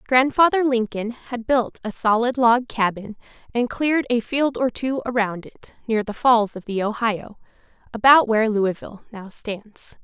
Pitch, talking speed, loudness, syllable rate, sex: 230 Hz, 160 wpm, -21 LUFS, 4.5 syllables/s, female